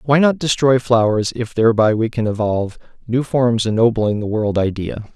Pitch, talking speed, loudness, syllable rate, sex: 115 Hz, 175 wpm, -17 LUFS, 5.0 syllables/s, male